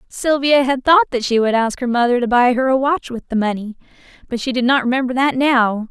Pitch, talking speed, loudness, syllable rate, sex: 250 Hz, 245 wpm, -16 LUFS, 5.7 syllables/s, female